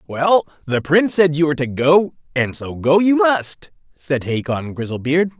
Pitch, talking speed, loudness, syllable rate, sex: 150 Hz, 180 wpm, -17 LUFS, 4.6 syllables/s, male